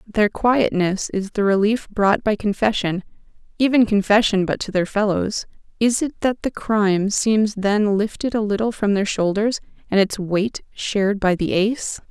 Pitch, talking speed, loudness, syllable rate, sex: 210 Hz, 165 wpm, -20 LUFS, 4.5 syllables/s, female